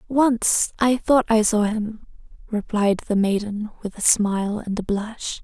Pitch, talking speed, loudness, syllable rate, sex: 215 Hz, 165 wpm, -21 LUFS, 3.9 syllables/s, female